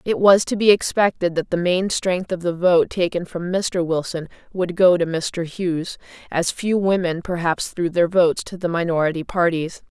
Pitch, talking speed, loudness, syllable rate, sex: 175 Hz, 195 wpm, -20 LUFS, 4.8 syllables/s, female